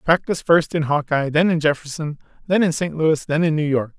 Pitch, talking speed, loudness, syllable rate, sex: 155 Hz, 225 wpm, -19 LUFS, 5.6 syllables/s, male